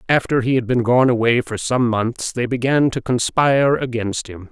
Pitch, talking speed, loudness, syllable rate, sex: 120 Hz, 200 wpm, -18 LUFS, 4.9 syllables/s, male